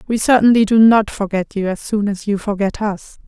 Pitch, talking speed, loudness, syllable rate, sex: 210 Hz, 220 wpm, -16 LUFS, 5.3 syllables/s, female